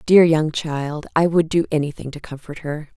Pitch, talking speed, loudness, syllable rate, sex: 155 Hz, 200 wpm, -20 LUFS, 4.8 syllables/s, female